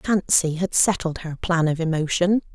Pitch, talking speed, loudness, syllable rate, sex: 170 Hz, 165 wpm, -21 LUFS, 4.6 syllables/s, female